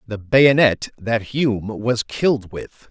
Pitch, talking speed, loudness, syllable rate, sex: 115 Hz, 145 wpm, -18 LUFS, 3.4 syllables/s, male